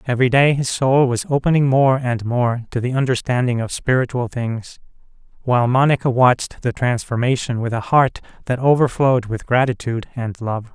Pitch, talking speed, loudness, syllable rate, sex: 125 Hz, 160 wpm, -18 LUFS, 5.4 syllables/s, male